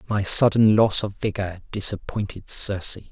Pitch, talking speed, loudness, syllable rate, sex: 100 Hz, 135 wpm, -22 LUFS, 4.9 syllables/s, male